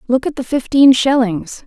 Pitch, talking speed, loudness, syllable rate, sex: 255 Hz, 180 wpm, -14 LUFS, 4.6 syllables/s, female